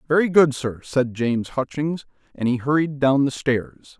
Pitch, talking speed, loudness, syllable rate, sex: 135 Hz, 180 wpm, -21 LUFS, 4.5 syllables/s, male